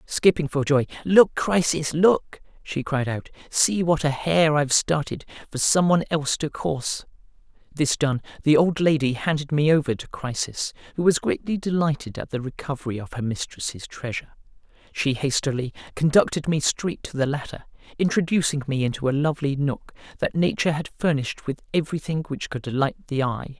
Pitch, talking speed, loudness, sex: 145 Hz, 170 wpm, -23 LUFS, male